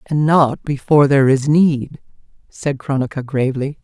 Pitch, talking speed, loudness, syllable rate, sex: 140 Hz, 140 wpm, -16 LUFS, 4.9 syllables/s, female